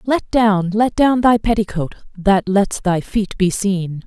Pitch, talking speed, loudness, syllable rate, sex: 200 Hz, 175 wpm, -17 LUFS, 3.7 syllables/s, female